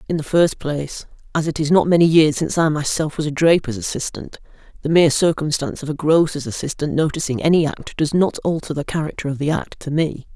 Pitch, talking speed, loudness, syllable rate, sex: 155 Hz, 215 wpm, -19 LUFS, 6.1 syllables/s, female